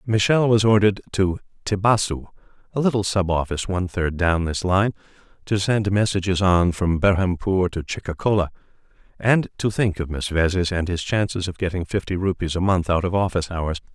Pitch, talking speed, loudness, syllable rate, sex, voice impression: 95 Hz, 175 wpm, -21 LUFS, 5.6 syllables/s, male, very masculine, very adult-like, slightly old, very thick, tensed, very powerful, slightly bright, slightly hard, slightly muffled, fluent, very cool, very intellectual, sincere, very calm, very mature, friendly, reassuring, very unique, elegant, wild, sweet, lively, kind, slightly sharp